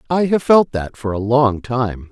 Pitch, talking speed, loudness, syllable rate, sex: 125 Hz, 225 wpm, -17 LUFS, 4.2 syllables/s, male